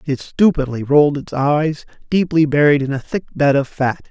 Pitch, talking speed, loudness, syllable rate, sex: 145 Hz, 190 wpm, -17 LUFS, 4.8 syllables/s, male